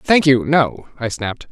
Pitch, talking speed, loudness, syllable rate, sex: 135 Hz, 200 wpm, -17 LUFS, 4.6 syllables/s, male